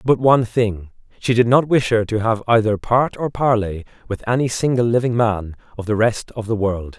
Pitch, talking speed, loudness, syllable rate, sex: 115 Hz, 215 wpm, -18 LUFS, 5.1 syllables/s, male